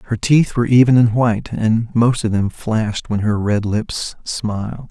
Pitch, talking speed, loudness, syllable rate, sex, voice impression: 115 Hz, 195 wpm, -17 LUFS, 4.6 syllables/s, male, masculine, adult-like, slightly weak, refreshing, calm, slightly modest